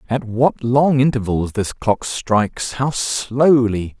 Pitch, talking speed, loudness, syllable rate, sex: 120 Hz, 135 wpm, -18 LUFS, 3.4 syllables/s, male